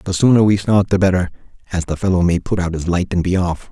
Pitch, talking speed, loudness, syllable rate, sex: 95 Hz, 275 wpm, -17 LUFS, 6.3 syllables/s, male